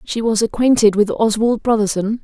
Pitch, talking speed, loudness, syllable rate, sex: 220 Hz, 160 wpm, -16 LUFS, 5.2 syllables/s, female